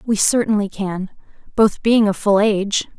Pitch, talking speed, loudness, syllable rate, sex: 205 Hz, 160 wpm, -17 LUFS, 4.6 syllables/s, female